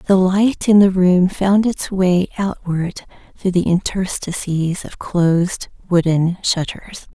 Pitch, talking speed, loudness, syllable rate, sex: 185 Hz, 135 wpm, -17 LUFS, 3.6 syllables/s, female